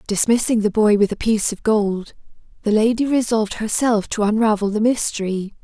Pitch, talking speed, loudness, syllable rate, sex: 215 Hz, 170 wpm, -19 LUFS, 5.5 syllables/s, female